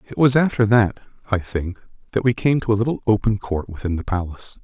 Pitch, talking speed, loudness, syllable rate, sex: 105 Hz, 220 wpm, -20 LUFS, 5.9 syllables/s, male